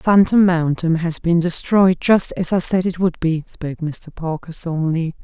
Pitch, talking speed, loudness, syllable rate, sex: 170 Hz, 185 wpm, -18 LUFS, 4.5 syllables/s, female